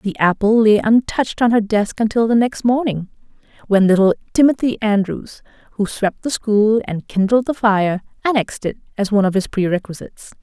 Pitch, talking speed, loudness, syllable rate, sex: 215 Hz, 175 wpm, -17 LUFS, 5.3 syllables/s, female